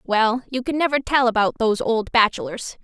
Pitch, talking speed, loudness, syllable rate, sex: 235 Hz, 190 wpm, -20 LUFS, 5.4 syllables/s, female